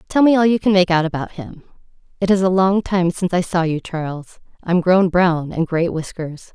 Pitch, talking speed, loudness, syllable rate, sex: 175 Hz, 230 wpm, -18 LUFS, 5.3 syllables/s, female